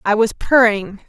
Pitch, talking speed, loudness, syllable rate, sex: 215 Hz, 165 wpm, -15 LUFS, 4.3 syllables/s, female